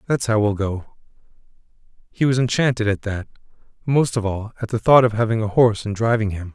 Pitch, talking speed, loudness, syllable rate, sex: 110 Hz, 200 wpm, -20 LUFS, 5.9 syllables/s, male